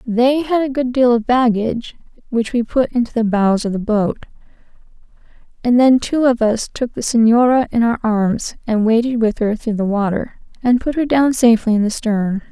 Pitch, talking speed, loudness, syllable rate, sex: 235 Hz, 200 wpm, -16 LUFS, 5.0 syllables/s, female